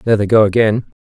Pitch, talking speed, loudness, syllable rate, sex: 105 Hz, 225 wpm, -14 LUFS, 7.1 syllables/s, male